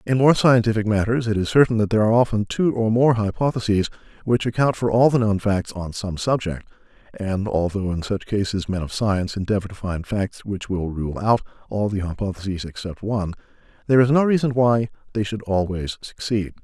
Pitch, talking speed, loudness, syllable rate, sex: 105 Hz, 200 wpm, -21 LUFS, 5.6 syllables/s, male